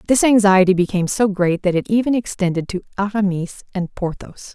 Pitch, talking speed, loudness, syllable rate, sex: 195 Hz, 170 wpm, -18 LUFS, 5.6 syllables/s, female